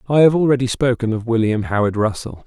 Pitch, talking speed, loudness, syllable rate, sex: 120 Hz, 195 wpm, -17 LUFS, 6.1 syllables/s, male